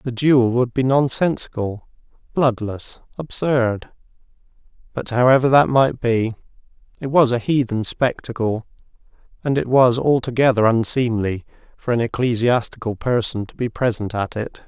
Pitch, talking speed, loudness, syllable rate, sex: 120 Hz, 125 wpm, -19 LUFS, 4.6 syllables/s, male